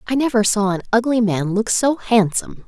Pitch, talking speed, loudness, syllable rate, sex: 220 Hz, 200 wpm, -18 LUFS, 5.5 syllables/s, female